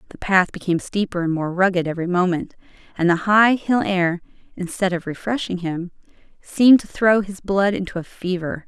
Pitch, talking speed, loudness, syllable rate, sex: 185 Hz, 180 wpm, -20 LUFS, 5.5 syllables/s, female